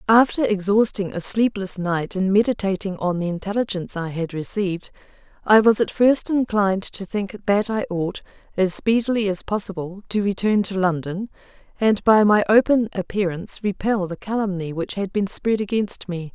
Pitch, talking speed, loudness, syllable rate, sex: 200 Hz, 165 wpm, -21 LUFS, 5.1 syllables/s, female